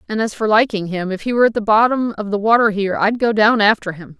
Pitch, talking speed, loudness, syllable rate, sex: 215 Hz, 285 wpm, -16 LUFS, 6.5 syllables/s, female